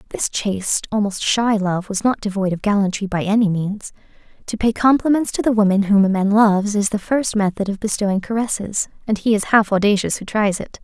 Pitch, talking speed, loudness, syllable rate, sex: 205 Hz, 210 wpm, -18 LUFS, 5.7 syllables/s, female